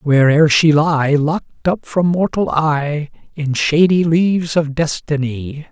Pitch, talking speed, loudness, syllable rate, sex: 155 Hz, 135 wpm, -15 LUFS, 3.7 syllables/s, male